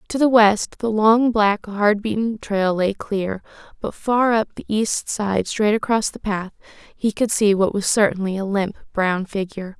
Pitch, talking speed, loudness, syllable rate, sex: 210 Hz, 190 wpm, -20 LUFS, 4.3 syllables/s, female